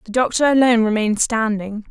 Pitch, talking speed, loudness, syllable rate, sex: 225 Hz, 155 wpm, -17 LUFS, 6.2 syllables/s, female